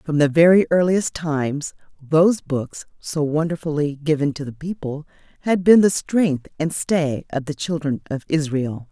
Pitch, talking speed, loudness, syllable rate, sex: 155 Hz, 160 wpm, -20 LUFS, 4.6 syllables/s, female